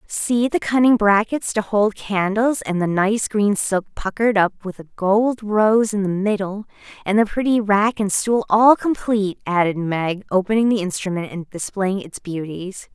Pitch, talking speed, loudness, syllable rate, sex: 205 Hz, 175 wpm, -19 LUFS, 4.4 syllables/s, female